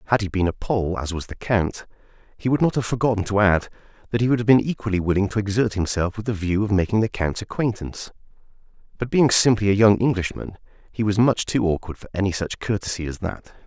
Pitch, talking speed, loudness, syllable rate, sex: 105 Hz, 225 wpm, -22 LUFS, 6.2 syllables/s, male